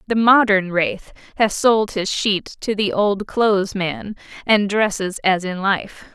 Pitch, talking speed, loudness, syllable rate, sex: 200 Hz, 165 wpm, -18 LUFS, 3.6 syllables/s, female